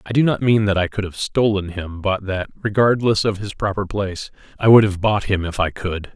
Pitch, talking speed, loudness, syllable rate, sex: 100 Hz, 245 wpm, -19 LUFS, 5.3 syllables/s, male